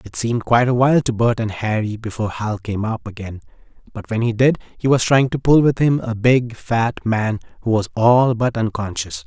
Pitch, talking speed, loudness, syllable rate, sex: 115 Hz, 220 wpm, -18 LUFS, 5.3 syllables/s, male